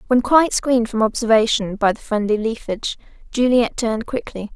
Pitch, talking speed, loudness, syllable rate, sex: 225 Hz, 160 wpm, -19 LUFS, 5.7 syllables/s, female